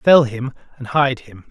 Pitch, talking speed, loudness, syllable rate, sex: 130 Hz, 200 wpm, -18 LUFS, 4.1 syllables/s, male